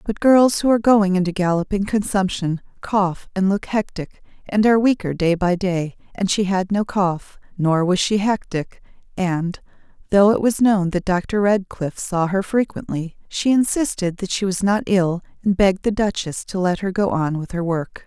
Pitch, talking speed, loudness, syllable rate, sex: 190 Hz, 190 wpm, -20 LUFS, 4.6 syllables/s, female